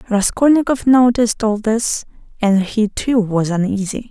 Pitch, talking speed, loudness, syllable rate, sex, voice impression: 220 Hz, 130 wpm, -16 LUFS, 4.5 syllables/s, female, feminine, adult-like, slightly intellectual, slightly calm, slightly kind